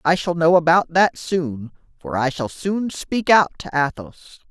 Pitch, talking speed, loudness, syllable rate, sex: 160 Hz, 185 wpm, -19 LUFS, 4.4 syllables/s, male